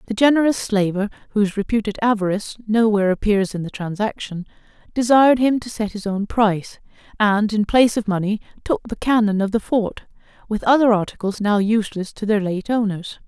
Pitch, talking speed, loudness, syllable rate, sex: 215 Hz, 170 wpm, -19 LUFS, 5.7 syllables/s, female